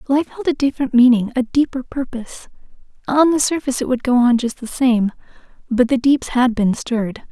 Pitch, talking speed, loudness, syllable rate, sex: 250 Hz, 195 wpm, -17 LUFS, 5.5 syllables/s, female